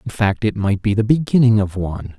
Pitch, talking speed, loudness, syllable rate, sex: 105 Hz, 245 wpm, -17 LUFS, 5.8 syllables/s, male